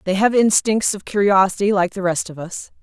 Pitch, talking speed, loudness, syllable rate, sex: 195 Hz, 210 wpm, -18 LUFS, 5.3 syllables/s, female